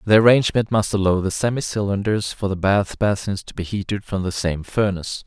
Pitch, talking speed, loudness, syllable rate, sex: 100 Hz, 205 wpm, -21 LUFS, 5.6 syllables/s, male